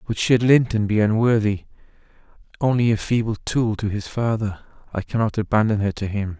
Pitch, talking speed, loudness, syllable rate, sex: 110 Hz, 150 wpm, -21 LUFS, 5.4 syllables/s, male